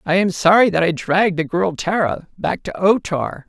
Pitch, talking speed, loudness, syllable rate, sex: 180 Hz, 225 wpm, -18 LUFS, 5.0 syllables/s, male